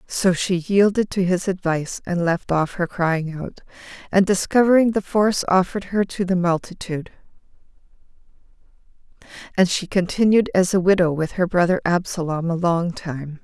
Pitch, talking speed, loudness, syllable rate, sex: 180 Hz, 150 wpm, -20 LUFS, 5.1 syllables/s, female